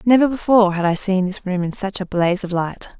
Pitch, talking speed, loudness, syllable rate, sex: 195 Hz, 260 wpm, -19 LUFS, 5.9 syllables/s, female